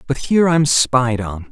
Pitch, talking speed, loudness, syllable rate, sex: 130 Hz, 195 wpm, -16 LUFS, 4.4 syllables/s, male